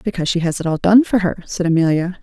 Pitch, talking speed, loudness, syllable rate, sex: 180 Hz, 270 wpm, -17 LUFS, 6.7 syllables/s, female